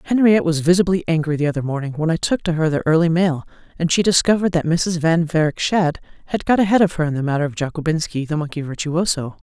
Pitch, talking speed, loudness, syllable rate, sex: 165 Hz, 230 wpm, -19 LUFS, 6.6 syllables/s, female